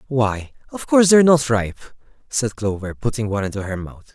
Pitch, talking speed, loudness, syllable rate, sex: 115 Hz, 190 wpm, -19 LUFS, 6.0 syllables/s, male